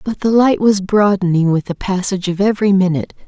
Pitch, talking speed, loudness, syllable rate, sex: 195 Hz, 200 wpm, -15 LUFS, 6.2 syllables/s, female